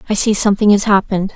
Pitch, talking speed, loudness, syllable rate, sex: 205 Hz, 220 wpm, -14 LUFS, 7.7 syllables/s, female